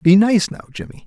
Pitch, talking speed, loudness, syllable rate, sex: 185 Hz, 225 wpm, -16 LUFS, 5.6 syllables/s, male